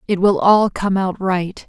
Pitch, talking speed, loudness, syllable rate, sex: 190 Hz, 215 wpm, -17 LUFS, 4.0 syllables/s, female